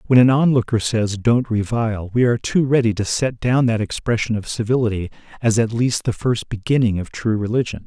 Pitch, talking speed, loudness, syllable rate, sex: 115 Hz, 200 wpm, -19 LUFS, 5.6 syllables/s, male